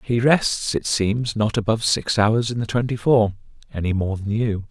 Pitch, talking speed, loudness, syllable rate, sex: 110 Hz, 190 wpm, -21 LUFS, 4.8 syllables/s, male